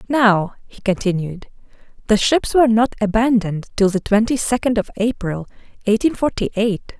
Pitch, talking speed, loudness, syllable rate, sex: 220 Hz, 145 wpm, -18 LUFS, 5.2 syllables/s, female